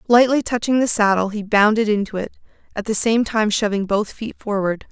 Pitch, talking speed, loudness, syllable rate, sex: 215 Hz, 195 wpm, -19 LUFS, 5.4 syllables/s, female